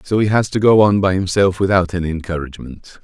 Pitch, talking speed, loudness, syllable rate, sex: 95 Hz, 220 wpm, -16 LUFS, 6.1 syllables/s, male